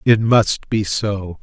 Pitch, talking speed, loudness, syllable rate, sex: 105 Hz, 170 wpm, -17 LUFS, 3.1 syllables/s, male